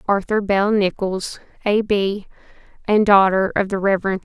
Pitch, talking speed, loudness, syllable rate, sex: 200 Hz, 140 wpm, -18 LUFS, 4.2 syllables/s, female